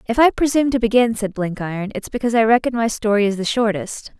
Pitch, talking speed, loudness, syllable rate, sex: 225 Hz, 230 wpm, -18 LUFS, 6.5 syllables/s, female